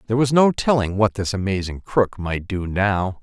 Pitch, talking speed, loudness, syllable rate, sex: 105 Hz, 205 wpm, -20 LUFS, 4.9 syllables/s, male